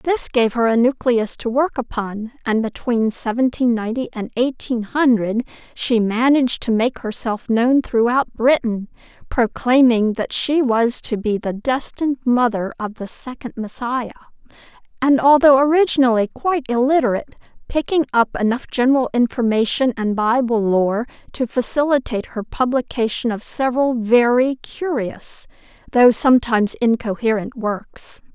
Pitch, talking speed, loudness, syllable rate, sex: 240 Hz, 130 wpm, -18 LUFS, 4.7 syllables/s, female